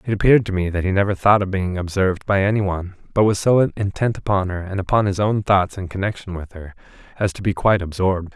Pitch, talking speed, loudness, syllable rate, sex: 95 Hz, 235 wpm, -20 LUFS, 6.3 syllables/s, male